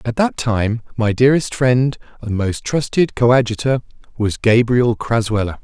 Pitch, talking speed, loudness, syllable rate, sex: 120 Hz, 140 wpm, -17 LUFS, 4.6 syllables/s, male